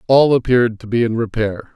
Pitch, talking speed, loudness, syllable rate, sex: 115 Hz, 205 wpm, -16 LUFS, 6.2 syllables/s, male